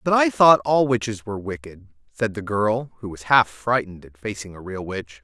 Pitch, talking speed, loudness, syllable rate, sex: 110 Hz, 220 wpm, -21 LUFS, 5.3 syllables/s, male